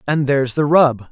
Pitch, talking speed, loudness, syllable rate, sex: 140 Hz, 215 wpm, -15 LUFS, 5.2 syllables/s, male